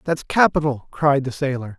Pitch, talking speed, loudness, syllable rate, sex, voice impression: 140 Hz, 170 wpm, -20 LUFS, 4.9 syllables/s, male, very masculine, slightly middle-aged, slightly wild, slightly sweet